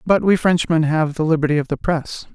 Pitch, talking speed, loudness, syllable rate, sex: 160 Hz, 230 wpm, -18 LUFS, 5.5 syllables/s, male